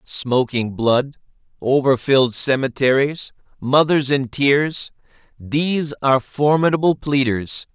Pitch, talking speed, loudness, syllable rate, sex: 135 Hz, 85 wpm, -18 LUFS, 3.9 syllables/s, male